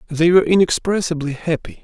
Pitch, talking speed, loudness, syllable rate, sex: 165 Hz, 130 wpm, -17 LUFS, 6.2 syllables/s, male